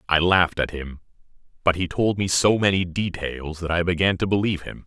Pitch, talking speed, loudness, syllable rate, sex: 90 Hz, 210 wpm, -22 LUFS, 5.7 syllables/s, male